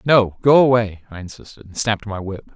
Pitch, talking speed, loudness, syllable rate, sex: 110 Hz, 210 wpm, -17 LUFS, 5.8 syllables/s, male